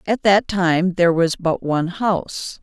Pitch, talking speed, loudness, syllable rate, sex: 180 Hz, 185 wpm, -18 LUFS, 4.5 syllables/s, female